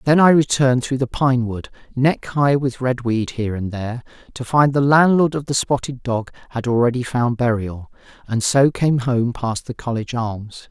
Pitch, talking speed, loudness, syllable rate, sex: 125 Hz, 195 wpm, -19 LUFS, 4.9 syllables/s, male